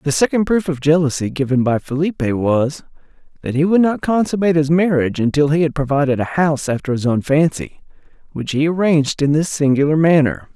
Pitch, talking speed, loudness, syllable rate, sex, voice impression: 150 Hz, 190 wpm, -17 LUFS, 5.9 syllables/s, male, masculine, adult-like, slightly thick, powerful, hard, muffled, cool, intellectual, friendly, reassuring, wild, lively, slightly strict